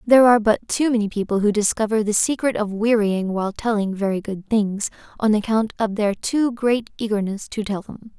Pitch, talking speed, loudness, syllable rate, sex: 215 Hz, 200 wpm, -21 LUFS, 5.4 syllables/s, female